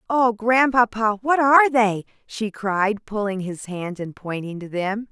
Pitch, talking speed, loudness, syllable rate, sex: 215 Hz, 165 wpm, -21 LUFS, 4.1 syllables/s, female